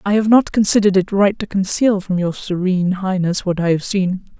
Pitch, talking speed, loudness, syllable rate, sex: 190 Hz, 220 wpm, -17 LUFS, 5.5 syllables/s, female